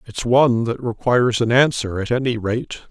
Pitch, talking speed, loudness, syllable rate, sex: 120 Hz, 185 wpm, -19 LUFS, 5.4 syllables/s, male